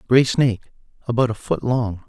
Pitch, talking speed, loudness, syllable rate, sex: 120 Hz, 175 wpm, -20 LUFS, 5.6 syllables/s, male